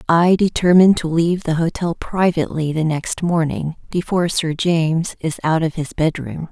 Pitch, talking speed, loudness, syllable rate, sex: 165 Hz, 165 wpm, -18 LUFS, 5.1 syllables/s, female